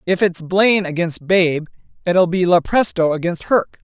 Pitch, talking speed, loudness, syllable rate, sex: 175 Hz, 155 wpm, -17 LUFS, 4.5 syllables/s, female